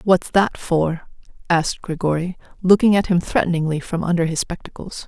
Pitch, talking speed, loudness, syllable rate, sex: 175 Hz, 155 wpm, -19 LUFS, 5.3 syllables/s, female